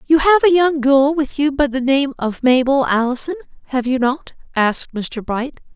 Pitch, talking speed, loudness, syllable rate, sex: 275 Hz, 200 wpm, -17 LUFS, 4.7 syllables/s, female